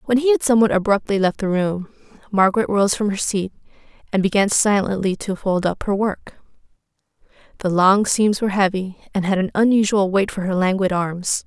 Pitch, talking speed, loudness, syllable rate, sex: 200 Hz, 185 wpm, -19 LUFS, 5.5 syllables/s, female